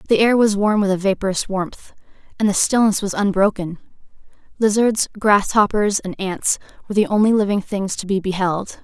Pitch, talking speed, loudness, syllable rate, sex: 200 Hz, 170 wpm, -18 LUFS, 5.3 syllables/s, female